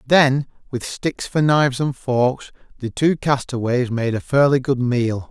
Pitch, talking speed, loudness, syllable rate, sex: 130 Hz, 170 wpm, -19 LUFS, 4.1 syllables/s, male